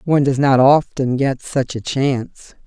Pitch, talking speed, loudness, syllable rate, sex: 135 Hz, 180 wpm, -17 LUFS, 4.5 syllables/s, female